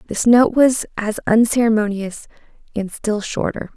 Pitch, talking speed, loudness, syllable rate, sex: 220 Hz, 130 wpm, -17 LUFS, 4.4 syllables/s, female